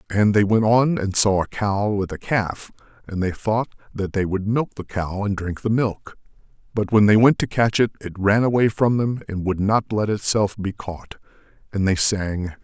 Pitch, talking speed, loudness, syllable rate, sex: 105 Hz, 220 wpm, -21 LUFS, 4.6 syllables/s, male